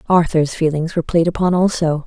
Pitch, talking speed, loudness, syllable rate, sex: 165 Hz, 175 wpm, -17 LUFS, 5.8 syllables/s, female